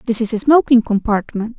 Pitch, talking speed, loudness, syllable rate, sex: 230 Hz, 190 wpm, -15 LUFS, 5.6 syllables/s, female